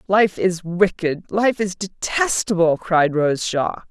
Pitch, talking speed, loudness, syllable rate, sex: 185 Hz, 125 wpm, -19 LUFS, 3.6 syllables/s, female